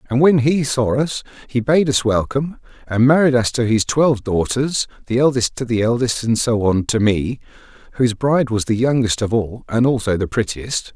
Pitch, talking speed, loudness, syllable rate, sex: 120 Hz, 205 wpm, -18 LUFS, 5.1 syllables/s, male